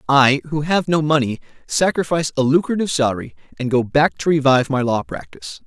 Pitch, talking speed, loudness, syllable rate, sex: 145 Hz, 180 wpm, -18 LUFS, 6.2 syllables/s, male